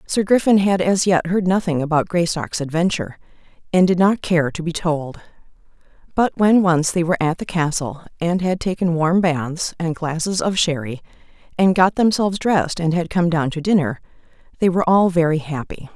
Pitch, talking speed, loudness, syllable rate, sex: 170 Hz, 185 wpm, -19 LUFS, 5.2 syllables/s, female